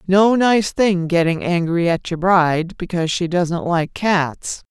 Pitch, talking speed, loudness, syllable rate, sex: 180 Hz, 165 wpm, -18 LUFS, 4.0 syllables/s, female